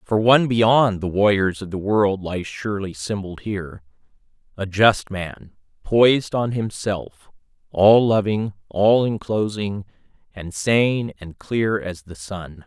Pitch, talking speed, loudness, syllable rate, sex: 100 Hz, 135 wpm, -20 LUFS, 3.8 syllables/s, male